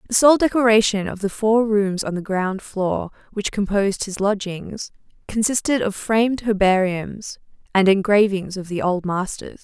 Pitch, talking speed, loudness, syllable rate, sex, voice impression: 205 Hz, 155 wpm, -20 LUFS, 4.6 syllables/s, female, very feminine, adult-like, slightly fluent, sincere, slightly calm, slightly sweet